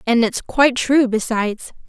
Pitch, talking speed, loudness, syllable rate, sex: 240 Hz, 160 wpm, -17 LUFS, 4.9 syllables/s, female